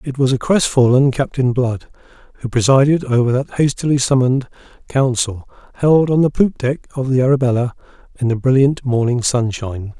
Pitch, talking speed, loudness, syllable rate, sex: 130 Hz, 155 wpm, -16 LUFS, 5.4 syllables/s, male